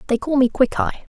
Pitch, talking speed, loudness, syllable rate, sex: 265 Hz, 205 wpm, -19 LUFS, 5.6 syllables/s, female